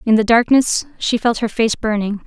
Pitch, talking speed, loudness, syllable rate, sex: 225 Hz, 210 wpm, -16 LUFS, 4.8 syllables/s, female